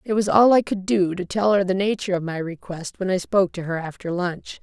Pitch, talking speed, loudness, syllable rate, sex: 190 Hz, 270 wpm, -22 LUFS, 5.8 syllables/s, female